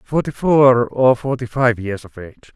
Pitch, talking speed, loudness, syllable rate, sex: 125 Hz, 190 wpm, -16 LUFS, 4.5 syllables/s, male